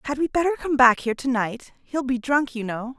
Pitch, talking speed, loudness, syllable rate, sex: 260 Hz, 260 wpm, -22 LUFS, 5.5 syllables/s, female